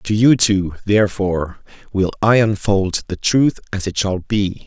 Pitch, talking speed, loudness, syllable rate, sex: 100 Hz, 165 wpm, -17 LUFS, 4.3 syllables/s, male